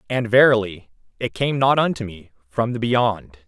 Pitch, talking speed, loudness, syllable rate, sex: 110 Hz, 175 wpm, -19 LUFS, 4.7 syllables/s, male